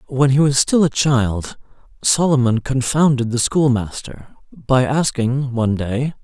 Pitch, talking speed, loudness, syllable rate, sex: 130 Hz, 135 wpm, -17 LUFS, 4.1 syllables/s, male